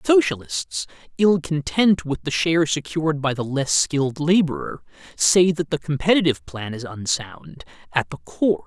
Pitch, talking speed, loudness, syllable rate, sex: 150 Hz, 150 wpm, -21 LUFS, 4.8 syllables/s, male